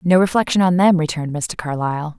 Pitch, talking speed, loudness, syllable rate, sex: 165 Hz, 190 wpm, -18 LUFS, 6.2 syllables/s, female